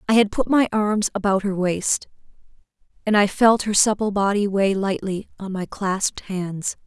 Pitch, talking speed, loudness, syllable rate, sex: 200 Hz, 175 wpm, -21 LUFS, 4.6 syllables/s, female